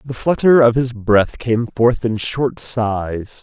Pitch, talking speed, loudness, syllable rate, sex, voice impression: 120 Hz, 175 wpm, -17 LUFS, 3.3 syllables/s, male, very masculine, very adult-like, old, very thick, slightly tensed, slightly weak, bright, soft, muffled, slightly halting, very cool, very intellectual, sincere, very calm, very mature, very friendly, very reassuring, very unique, very elegant, slightly wild, sweet, slightly lively, very kind